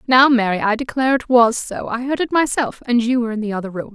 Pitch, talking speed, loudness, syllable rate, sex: 240 Hz, 275 wpm, -18 LUFS, 6.4 syllables/s, female